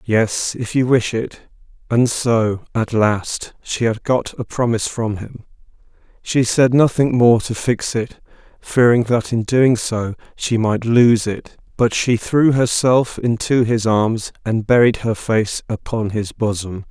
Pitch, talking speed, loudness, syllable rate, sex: 115 Hz, 160 wpm, -17 LUFS, 3.8 syllables/s, male